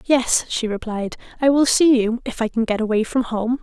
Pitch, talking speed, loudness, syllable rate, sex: 235 Hz, 230 wpm, -19 LUFS, 5.0 syllables/s, female